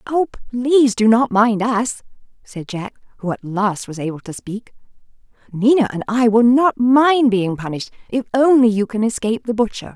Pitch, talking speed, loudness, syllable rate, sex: 225 Hz, 180 wpm, -17 LUFS, 5.0 syllables/s, female